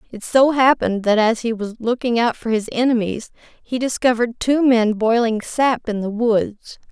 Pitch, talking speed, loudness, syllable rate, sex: 230 Hz, 180 wpm, -18 LUFS, 4.8 syllables/s, female